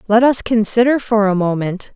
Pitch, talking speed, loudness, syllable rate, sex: 215 Hz, 185 wpm, -15 LUFS, 5.0 syllables/s, female